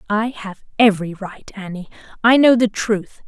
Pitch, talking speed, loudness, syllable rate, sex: 205 Hz, 165 wpm, -17 LUFS, 4.7 syllables/s, female